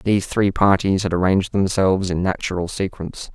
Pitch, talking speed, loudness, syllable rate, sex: 95 Hz, 160 wpm, -19 LUFS, 5.8 syllables/s, male